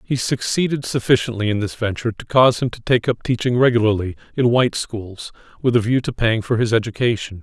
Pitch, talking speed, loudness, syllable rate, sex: 115 Hz, 200 wpm, -19 LUFS, 6.0 syllables/s, male